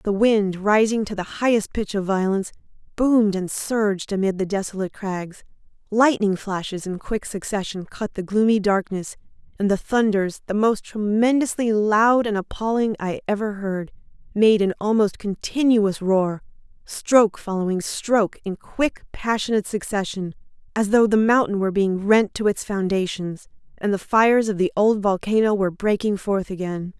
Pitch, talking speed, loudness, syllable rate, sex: 205 Hz, 155 wpm, -21 LUFS, 4.9 syllables/s, female